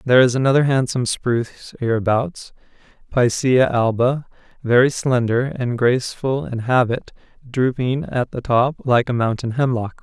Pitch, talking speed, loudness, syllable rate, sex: 125 Hz, 130 wpm, -19 LUFS, 4.7 syllables/s, male